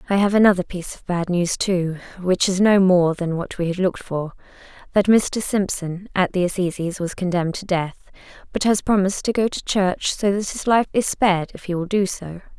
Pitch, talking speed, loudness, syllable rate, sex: 185 Hz, 215 wpm, -20 LUFS, 5.3 syllables/s, female